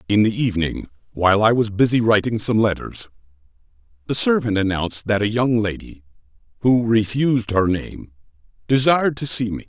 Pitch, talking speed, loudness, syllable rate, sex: 105 Hz, 155 wpm, -19 LUFS, 5.5 syllables/s, male